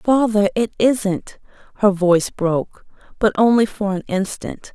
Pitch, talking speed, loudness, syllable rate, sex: 205 Hz, 140 wpm, -18 LUFS, 4.2 syllables/s, female